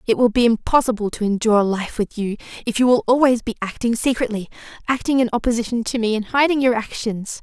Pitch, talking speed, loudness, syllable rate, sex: 230 Hz, 195 wpm, -19 LUFS, 6.2 syllables/s, female